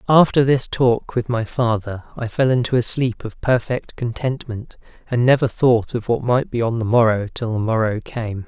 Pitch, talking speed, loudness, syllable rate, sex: 120 Hz, 200 wpm, -19 LUFS, 4.8 syllables/s, male